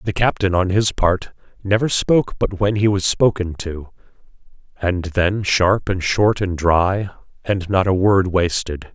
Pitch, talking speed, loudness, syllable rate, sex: 95 Hz, 170 wpm, -18 LUFS, 4.1 syllables/s, male